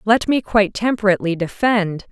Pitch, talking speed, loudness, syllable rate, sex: 205 Hz, 140 wpm, -18 LUFS, 5.6 syllables/s, female